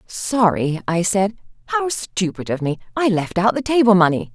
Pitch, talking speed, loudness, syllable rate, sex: 200 Hz, 180 wpm, -19 LUFS, 4.6 syllables/s, female